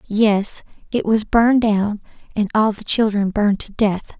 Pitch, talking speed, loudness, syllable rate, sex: 210 Hz, 170 wpm, -18 LUFS, 4.4 syllables/s, female